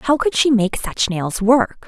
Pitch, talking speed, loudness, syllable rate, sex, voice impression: 235 Hz, 225 wpm, -17 LUFS, 3.9 syllables/s, female, feminine, adult-like, slightly fluent, slightly unique, slightly intense